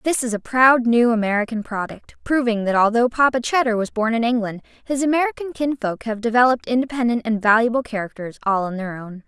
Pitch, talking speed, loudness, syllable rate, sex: 235 Hz, 190 wpm, -20 LUFS, 5.9 syllables/s, female